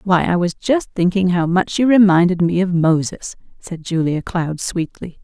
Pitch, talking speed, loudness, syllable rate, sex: 180 Hz, 185 wpm, -17 LUFS, 4.6 syllables/s, female